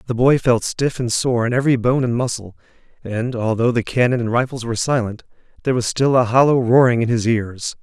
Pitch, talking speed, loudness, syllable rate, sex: 120 Hz, 215 wpm, -18 LUFS, 5.8 syllables/s, male